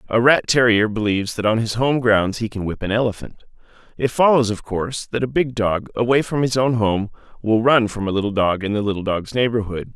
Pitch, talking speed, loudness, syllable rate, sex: 110 Hz, 230 wpm, -19 LUFS, 5.7 syllables/s, male